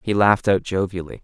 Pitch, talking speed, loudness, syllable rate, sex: 95 Hz, 195 wpm, -20 LUFS, 6.2 syllables/s, male